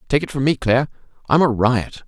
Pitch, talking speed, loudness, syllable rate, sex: 130 Hz, 230 wpm, -18 LUFS, 6.1 syllables/s, male